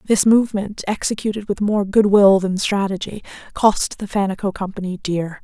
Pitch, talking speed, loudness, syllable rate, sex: 200 Hz, 155 wpm, -18 LUFS, 5.0 syllables/s, female